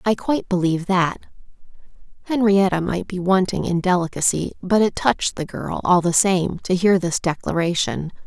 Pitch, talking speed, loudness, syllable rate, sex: 185 Hz, 160 wpm, -20 LUFS, 5.1 syllables/s, female